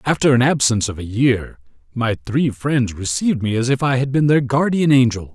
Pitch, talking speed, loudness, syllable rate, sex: 125 Hz, 215 wpm, -17 LUFS, 5.4 syllables/s, male